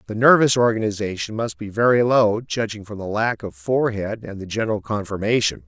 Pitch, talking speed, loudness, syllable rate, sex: 110 Hz, 180 wpm, -21 LUFS, 5.7 syllables/s, male